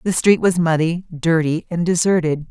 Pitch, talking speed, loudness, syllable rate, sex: 170 Hz, 170 wpm, -18 LUFS, 4.8 syllables/s, female